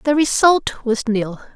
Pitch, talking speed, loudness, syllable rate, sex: 250 Hz, 155 wpm, -17 LUFS, 3.5 syllables/s, female